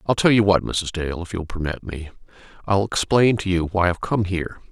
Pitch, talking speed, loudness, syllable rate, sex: 95 Hz, 240 wpm, -21 LUFS, 5.6 syllables/s, male